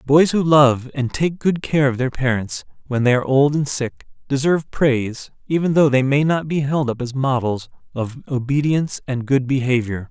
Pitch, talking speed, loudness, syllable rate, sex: 135 Hz, 195 wpm, -19 LUFS, 5.0 syllables/s, male